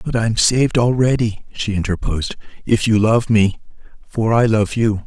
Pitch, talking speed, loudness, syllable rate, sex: 110 Hz, 165 wpm, -17 LUFS, 5.1 syllables/s, male